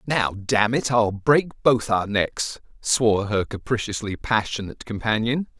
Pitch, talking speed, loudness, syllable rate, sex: 115 Hz, 130 wpm, -22 LUFS, 4.3 syllables/s, male